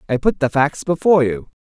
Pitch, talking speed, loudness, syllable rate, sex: 145 Hz, 220 wpm, -17 LUFS, 6.0 syllables/s, male